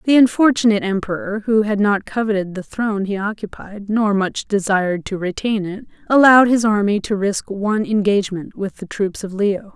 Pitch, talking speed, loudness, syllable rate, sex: 205 Hz, 180 wpm, -18 LUFS, 5.4 syllables/s, female